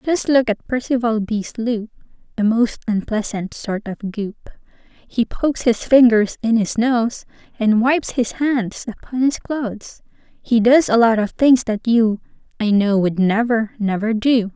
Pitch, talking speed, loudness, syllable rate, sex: 230 Hz, 165 wpm, -18 LUFS, 4.3 syllables/s, female